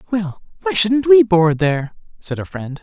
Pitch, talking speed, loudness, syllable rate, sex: 190 Hz, 190 wpm, -16 LUFS, 4.6 syllables/s, male